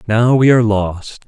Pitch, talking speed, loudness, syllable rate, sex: 110 Hz, 190 wpm, -13 LUFS, 4.5 syllables/s, male